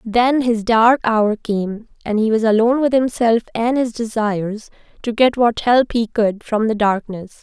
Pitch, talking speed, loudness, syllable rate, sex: 225 Hz, 185 wpm, -17 LUFS, 4.3 syllables/s, female